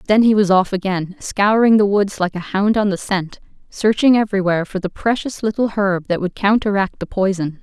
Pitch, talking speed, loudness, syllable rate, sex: 200 Hz, 205 wpm, -17 LUFS, 5.3 syllables/s, female